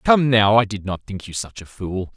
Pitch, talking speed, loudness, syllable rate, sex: 105 Hz, 280 wpm, -20 LUFS, 5.0 syllables/s, male